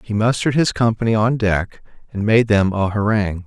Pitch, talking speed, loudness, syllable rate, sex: 110 Hz, 190 wpm, -18 LUFS, 5.5 syllables/s, male